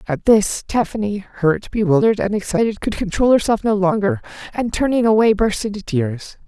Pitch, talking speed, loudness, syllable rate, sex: 210 Hz, 165 wpm, -18 LUFS, 5.3 syllables/s, female